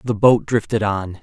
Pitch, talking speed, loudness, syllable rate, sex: 105 Hz, 195 wpm, -18 LUFS, 4.4 syllables/s, male